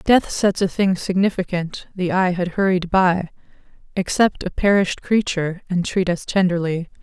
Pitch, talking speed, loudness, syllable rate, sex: 185 Hz, 145 wpm, -20 LUFS, 4.8 syllables/s, female